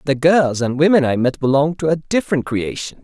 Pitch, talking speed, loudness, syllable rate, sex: 145 Hz, 215 wpm, -17 LUFS, 5.9 syllables/s, male